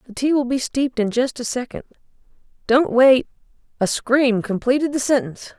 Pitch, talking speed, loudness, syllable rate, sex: 255 Hz, 170 wpm, -19 LUFS, 5.5 syllables/s, female